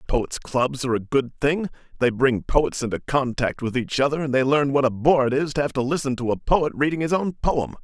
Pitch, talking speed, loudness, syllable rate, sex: 135 Hz, 255 wpm, -22 LUFS, 5.4 syllables/s, male